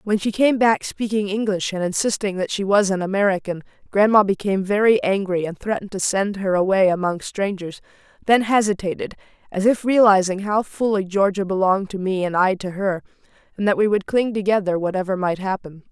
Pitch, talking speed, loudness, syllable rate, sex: 195 Hz, 185 wpm, -20 LUFS, 5.7 syllables/s, female